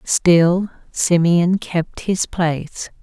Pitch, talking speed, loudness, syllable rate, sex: 175 Hz, 100 wpm, -17 LUFS, 2.7 syllables/s, female